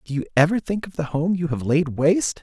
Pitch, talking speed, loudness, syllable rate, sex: 165 Hz, 270 wpm, -21 LUFS, 5.9 syllables/s, male